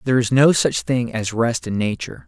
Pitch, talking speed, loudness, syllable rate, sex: 120 Hz, 235 wpm, -19 LUFS, 5.6 syllables/s, male